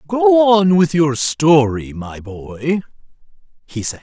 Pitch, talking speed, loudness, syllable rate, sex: 145 Hz, 135 wpm, -15 LUFS, 3.3 syllables/s, male